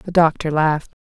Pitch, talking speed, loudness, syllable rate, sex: 160 Hz, 175 wpm, -18 LUFS, 5.6 syllables/s, female